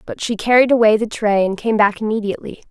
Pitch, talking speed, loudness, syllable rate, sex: 215 Hz, 220 wpm, -16 LUFS, 6.3 syllables/s, female